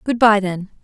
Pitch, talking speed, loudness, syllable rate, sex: 205 Hz, 215 wpm, -16 LUFS, 4.8 syllables/s, female